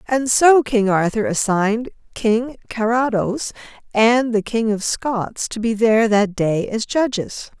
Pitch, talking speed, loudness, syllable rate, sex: 225 Hz, 150 wpm, -18 LUFS, 3.9 syllables/s, female